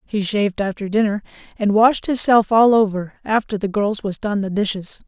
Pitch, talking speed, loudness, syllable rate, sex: 210 Hz, 190 wpm, -18 LUFS, 5.0 syllables/s, female